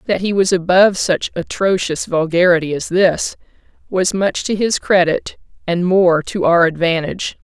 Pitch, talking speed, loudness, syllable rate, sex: 180 Hz, 155 wpm, -16 LUFS, 4.7 syllables/s, female